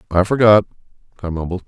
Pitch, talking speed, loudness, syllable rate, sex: 95 Hz, 145 wpm, -16 LUFS, 6.9 syllables/s, male